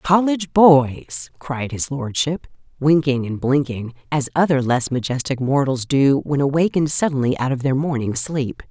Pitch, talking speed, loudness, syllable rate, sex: 140 Hz, 150 wpm, -19 LUFS, 4.7 syllables/s, female